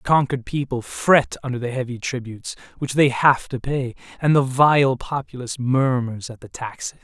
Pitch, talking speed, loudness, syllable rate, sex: 130 Hz, 180 wpm, -21 LUFS, 5.3 syllables/s, male